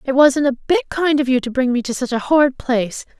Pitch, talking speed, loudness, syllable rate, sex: 260 Hz, 280 wpm, -17 LUFS, 5.7 syllables/s, female